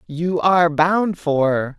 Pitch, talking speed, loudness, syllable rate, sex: 165 Hz, 135 wpm, -18 LUFS, 3.0 syllables/s, female